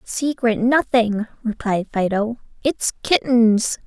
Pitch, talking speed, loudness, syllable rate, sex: 230 Hz, 95 wpm, -19 LUFS, 3.5 syllables/s, female